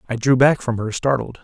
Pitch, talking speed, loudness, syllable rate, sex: 125 Hz, 250 wpm, -18 LUFS, 5.7 syllables/s, male